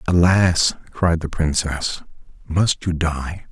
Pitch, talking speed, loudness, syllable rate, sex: 85 Hz, 120 wpm, -20 LUFS, 3.3 syllables/s, male